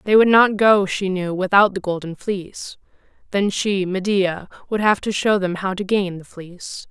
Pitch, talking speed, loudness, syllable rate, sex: 195 Hz, 200 wpm, -19 LUFS, 4.7 syllables/s, female